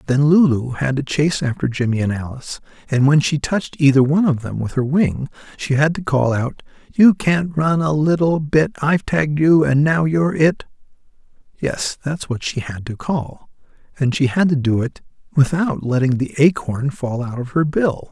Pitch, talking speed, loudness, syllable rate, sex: 145 Hz, 200 wpm, -18 LUFS, 5.0 syllables/s, male